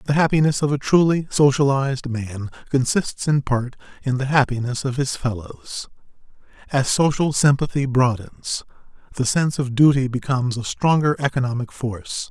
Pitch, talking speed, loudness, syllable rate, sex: 135 Hz, 140 wpm, -20 LUFS, 5.0 syllables/s, male